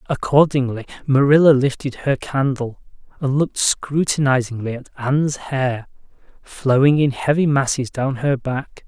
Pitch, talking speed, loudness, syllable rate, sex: 135 Hz, 120 wpm, -19 LUFS, 4.6 syllables/s, male